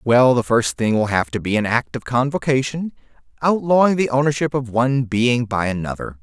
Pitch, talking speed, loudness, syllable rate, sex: 125 Hz, 195 wpm, -19 LUFS, 5.3 syllables/s, male